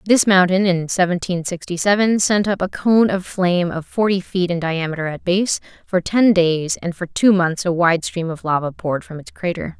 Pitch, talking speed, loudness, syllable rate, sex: 180 Hz, 215 wpm, -18 LUFS, 5.0 syllables/s, female